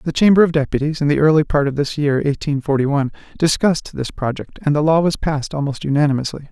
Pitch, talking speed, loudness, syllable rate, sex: 145 Hz, 220 wpm, -18 LUFS, 6.6 syllables/s, male